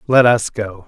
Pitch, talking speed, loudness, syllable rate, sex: 110 Hz, 205 wpm, -15 LUFS, 4.1 syllables/s, male